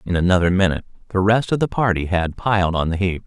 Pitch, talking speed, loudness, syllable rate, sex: 95 Hz, 240 wpm, -19 LUFS, 6.6 syllables/s, male